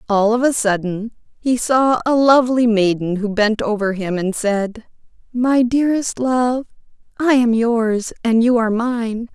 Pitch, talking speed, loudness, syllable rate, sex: 230 Hz, 160 wpm, -17 LUFS, 4.3 syllables/s, female